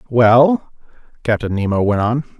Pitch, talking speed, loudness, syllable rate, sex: 115 Hz, 125 wpm, -15 LUFS, 4.4 syllables/s, male